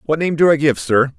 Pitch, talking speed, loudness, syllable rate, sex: 140 Hz, 305 wpm, -15 LUFS, 5.9 syllables/s, male